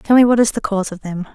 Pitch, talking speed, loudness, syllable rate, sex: 210 Hz, 355 wpm, -16 LUFS, 7.1 syllables/s, female